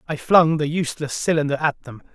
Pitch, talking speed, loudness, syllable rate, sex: 150 Hz, 195 wpm, -20 LUFS, 5.9 syllables/s, male